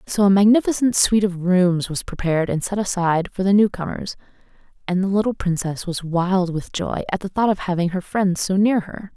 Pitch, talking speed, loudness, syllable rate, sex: 190 Hz, 215 wpm, -20 LUFS, 5.5 syllables/s, female